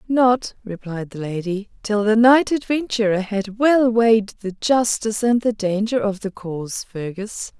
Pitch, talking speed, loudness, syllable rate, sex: 215 Hz, 160 wpm, -20 LUFS, 4.3 syllables/s, female